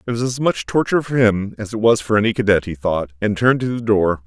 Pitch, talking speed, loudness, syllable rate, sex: 105 Hz, 280 wpm, -18 LUFS, 6.4 syllables/s, male